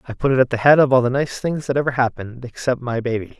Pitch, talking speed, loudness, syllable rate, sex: 125 Hz, 300 wpm, -18 LUFS, 6.8 syllables/s, male